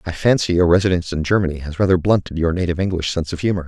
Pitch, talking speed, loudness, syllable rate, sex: 85 Hz, 245 wpm, -18 LUFS, 7.9 syllables/s, male